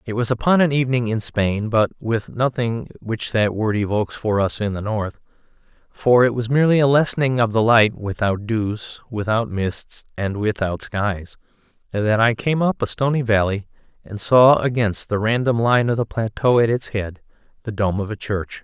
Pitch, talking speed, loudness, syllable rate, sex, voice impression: 115 Hz, 185 wpm, -20 LUFS, 4.8 syllables/s, male, masculine, adult-like, tensed, slightly weak, slightly bright, fluent, intellectual, calm, slightly wild, kind, modest